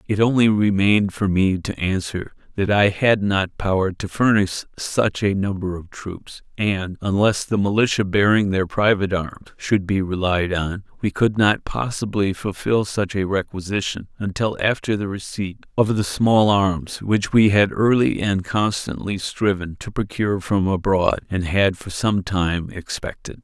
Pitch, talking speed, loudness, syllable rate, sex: 100 Hz, 165 wpm, -20 LUFS, 4.4 syllables/s, male